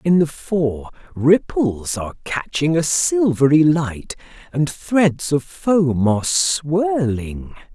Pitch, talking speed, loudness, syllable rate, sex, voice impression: 150 Hz, 115 wpm, -18 LUFS, 3.2 syllables/s, male, masculine, adult-like, slightly refreshing, slightly sincere